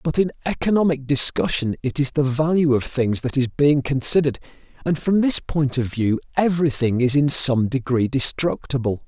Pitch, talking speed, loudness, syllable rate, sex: 140 Hz, 170 wpm, -20 LUFS, 5.1 syllables/s, male